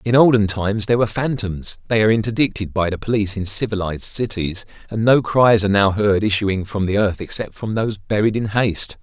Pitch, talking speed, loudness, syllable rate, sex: 105 Hz, 205 wpm, -19 LUFS, 6.1 syllables/s, male